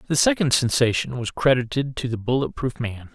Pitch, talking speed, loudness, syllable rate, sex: 125 Hz, 190 wpm, -22 LUFS, 5.4 syllables/s, male